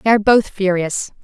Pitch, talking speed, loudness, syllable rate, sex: 200 Hz, 195 wpm, -16 LUFS, 5.9 syllables/s, female